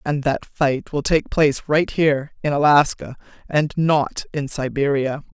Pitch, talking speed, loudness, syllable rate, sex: 145 Hz, 135 wpm, -20 LUFS, 4.4 syllables/s, female